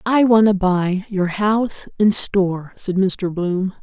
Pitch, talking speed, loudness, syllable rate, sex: 195 Hz, 175 wpm, -18 LUFS, 3.8 syllables/s, female